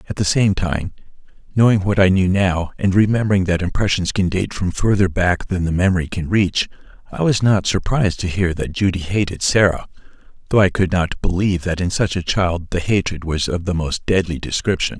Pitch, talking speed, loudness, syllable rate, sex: 95 Hz, 205 wpm, -18 LUFS, 5.5 syllables/s, male